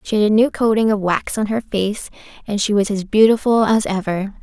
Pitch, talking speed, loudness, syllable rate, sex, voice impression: 210 Hz, 230 wpm, -17 LUFS, 5.4 syllables/s, female, very feminine, slightly young, slightly adult-like, very thin, very tensed, slightly powerful, very bright, slightly soft, very clear, fluent, slightly raspy, very cute, slightly intellectual, very refreshing, sincere, slightly calm, very friendly, very reassuring, very unique, slightly elegant, wild, sweet, lively, slightly kind, slightly sharp, light